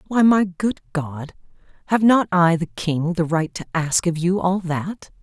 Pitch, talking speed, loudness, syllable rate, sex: 175 Hz, 195 wpm, -20 LUFS, 4.0 syllables/s, female